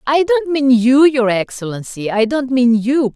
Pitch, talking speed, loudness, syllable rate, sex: 255 Hz, 190 wpm, -15 LUFS, 4.3 syllables/s, female